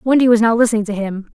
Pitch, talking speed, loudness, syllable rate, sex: 225 Hz, 265 wpm, -15 LUFS, 7.1 syllables/s, female